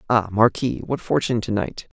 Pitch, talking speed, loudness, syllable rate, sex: 110 Hz, 180 wpm, -22 LUFS, 5.5 syllables/s, male